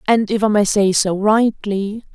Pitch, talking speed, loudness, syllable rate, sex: 210 Hz, 140 wpm, -16 LUFS, 4.3 syllables/s, female